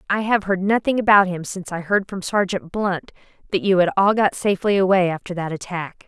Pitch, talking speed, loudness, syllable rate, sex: 190 Hz, 215 wpm, -20 LUFS, 5.6 syllables/s, female